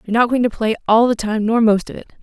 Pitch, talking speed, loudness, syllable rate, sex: 225 Hz, 325 wpm, -16 LUFS, 7.0 syllables/s, female